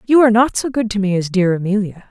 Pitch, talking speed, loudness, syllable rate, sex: 210 Hz, 285 wpm, -16 LUFS, 6.6 syllables/s, female